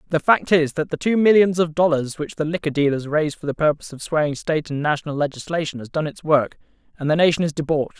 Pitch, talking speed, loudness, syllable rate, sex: 155 Hz, 240 wpm, -20 LUFS, 6.5 syllables/s, male